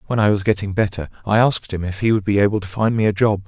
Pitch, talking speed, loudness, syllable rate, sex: 105 Hz, 310 wpm, -19 LUFS, 7.0 syllables/s, male